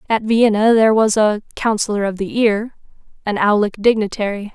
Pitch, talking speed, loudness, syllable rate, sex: 215 Hz, 145 wpm, -16 LUFS, 5.3 syllables/s, female